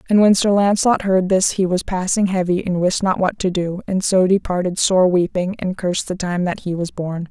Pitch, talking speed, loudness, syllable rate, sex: 185 Hz, 240 wpm, -18 LUFS, 5.3 syllables/s, female